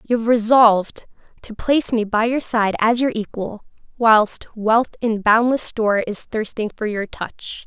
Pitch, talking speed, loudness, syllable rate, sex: 225 Hz, 170 wpm, -18 LUFS, 4.4 syllables/s, female